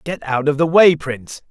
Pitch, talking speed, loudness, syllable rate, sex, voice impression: 150 Hz, 240 wpm, -15 LUFS, 5.1 syllables/s, male, masculine, adult-like, slightly fluent, cool, refreshing, sincere